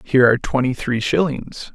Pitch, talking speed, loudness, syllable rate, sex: 130 Hz, 170 wpm, -18 LUFS, 5.5 syllables/s, male